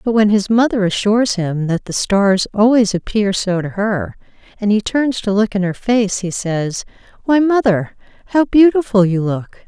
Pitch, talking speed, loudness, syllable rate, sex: 210 Hz, 185 wpm, -16 LUFS, 4.6 syllables/s, female